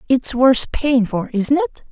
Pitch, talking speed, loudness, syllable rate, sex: 240 Hz, 190 wpm, -17 LUFS, 4.1 syllables/s, female